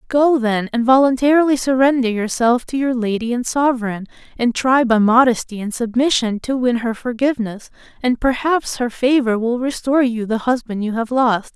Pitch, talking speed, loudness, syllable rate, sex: 245 Hz, 170 wpm, -17 LUFS, 5.1 syllables/s, female